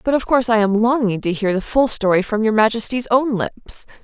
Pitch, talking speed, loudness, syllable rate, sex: 225 Hz, 240 wpm, -17 LUFS, 5.5 syllables/s, female